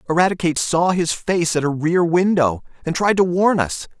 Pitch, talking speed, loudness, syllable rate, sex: 165 Hz, 195 wpm, -18 LUFS, 5.2 syllables/s, male